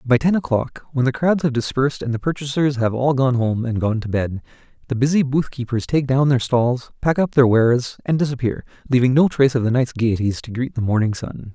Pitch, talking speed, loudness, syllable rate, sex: 130 Hz, 235 wpm, -19 LUFS, 5.7 syllables/s, male